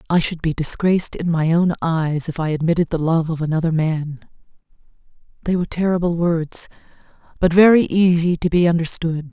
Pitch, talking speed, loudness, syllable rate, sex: 165 Hz, 165 wpm, -18 LUFS, 5.4 syllables/s, female